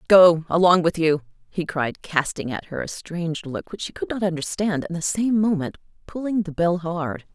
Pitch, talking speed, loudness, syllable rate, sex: 170 Hz, 205 wpm, -22 LUFS, 4.9 syllables/s, female